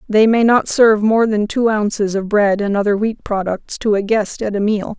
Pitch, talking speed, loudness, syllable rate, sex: 210 Hz, 240 wpm, -16 LUFS, 5.0 syllables/s, female